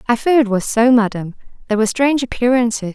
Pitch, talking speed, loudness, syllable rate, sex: 235 Hz, 205 wpm, -16 LUFS, 7.0 syllables/s, female